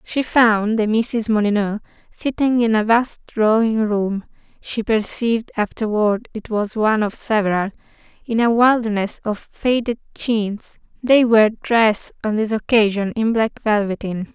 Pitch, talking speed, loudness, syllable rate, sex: 220 Hz, 140 wpm, -19 LUFS, 3.6 syllables/s, female